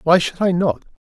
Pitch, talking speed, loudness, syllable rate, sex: 175 Hz, 225 wpm, -18 LUFS, 5.3 syllables/s, male